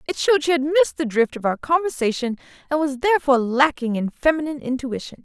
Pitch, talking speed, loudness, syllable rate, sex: 280 Hz, 195 wpm, -21 LUFS, 6.6 syllables/s, female